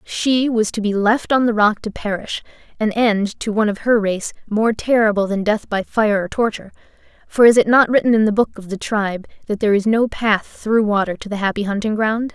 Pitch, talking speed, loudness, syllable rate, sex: 215 Hz, 235 wpm, -18 LUFS, 5.5 syllables/s, female